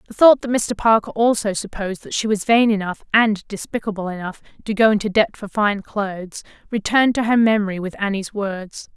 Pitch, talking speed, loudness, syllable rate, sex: 210 Hz, 195 wpm, -19 LUFS, 5.5 syllables/s, female